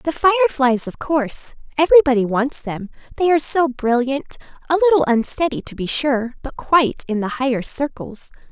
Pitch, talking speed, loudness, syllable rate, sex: 275 Hz, 155 wpm, -18 LUFS, 5.4 syllables/s, female